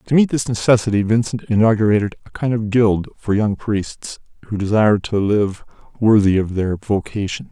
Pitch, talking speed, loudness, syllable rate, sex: 105 Hz, 170 wpm, -18 LUFS, 5.2 syllables/s, male